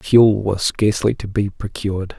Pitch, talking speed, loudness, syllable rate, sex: 100 Hz, 165 wpm, -18 LUFS, 4.7 syllables/s, male